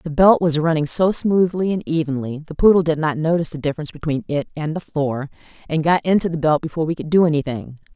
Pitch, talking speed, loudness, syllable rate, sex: 160 Hz, 225 wpm, -19 LUFS, 6.4 syllables/s, female